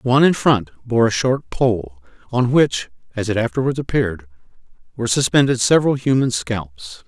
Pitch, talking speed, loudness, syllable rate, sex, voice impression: 115 Hz, 155 wpm, -18 LUFS, 5.1 syllables/s, male, very masculine, very adult-like, slightly middle-aged, very thick, tensed, powerful, very cool, intellectual, very sincere, very calm, very mature, friendly, reassuring, unique, elegant, very wild, lively, kind